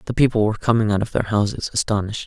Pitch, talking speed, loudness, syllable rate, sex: 110 Hz, 240 wpm, -20 LUFS, 7.5 syllables/s, male